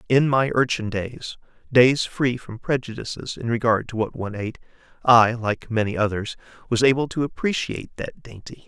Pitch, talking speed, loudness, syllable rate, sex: 120 Hz, 165 wpm, -22 LUFS, 5.2 syllables/s, male